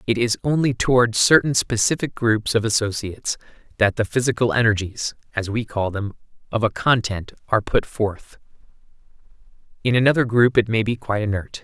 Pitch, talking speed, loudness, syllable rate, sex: 115 Hz, 160 wpm, -20 LUFS, 5.5 syllables/s, male